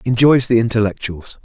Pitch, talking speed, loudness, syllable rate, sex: 115 Hz, 125 wpm, -15 LUFS, 5.3 syllables/s, male